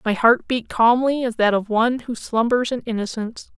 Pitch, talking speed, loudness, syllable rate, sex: 235 Hz, 200 wpm, -20 LUFS, 5.3 syllables/s, female